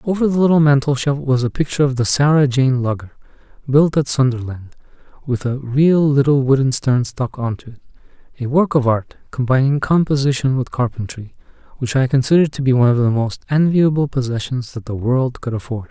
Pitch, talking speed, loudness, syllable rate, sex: 135 Hz, 185 wpm, -17 LUFS, 5.7 syllables/s, male